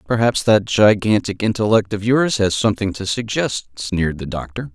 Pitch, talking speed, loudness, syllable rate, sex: 105 Hz, 165 wpm, -18 LUFS, 5.1 syllables/s, male